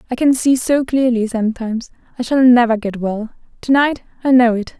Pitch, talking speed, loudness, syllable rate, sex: 240 Hz, 190 wpm, -16 LUFS, 5.5 syllables/s, female